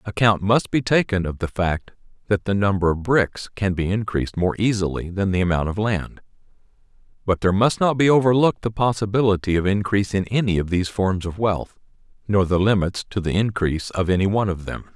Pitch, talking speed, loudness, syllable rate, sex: 100 Hz, 200 wpm, -21 LUFS, 5.9 syllables/s, male